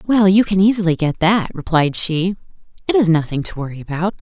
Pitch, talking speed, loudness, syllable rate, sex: 180 Hz, 195 wpm, -17 LUFS, 5.8 syllables/s, female